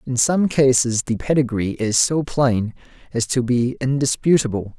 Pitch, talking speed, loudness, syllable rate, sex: 130 Hz, 150 wpm, -19 LUFS, 4.5 syllables/s, male